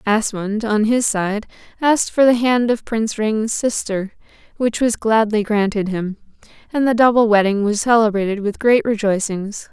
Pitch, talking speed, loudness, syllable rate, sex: 220 Hz, 160 wpm, -18 LUFS, 4.8 syllables/s, female